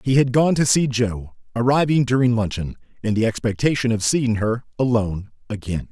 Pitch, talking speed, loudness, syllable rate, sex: 115 Hz, 175 wpm, -20 LUFS, 5.4 syllables/s, male